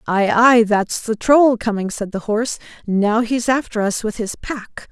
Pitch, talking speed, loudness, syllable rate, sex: 220 Hz, 195 wpm, -18 LUFS, 4.3 syllables/s, female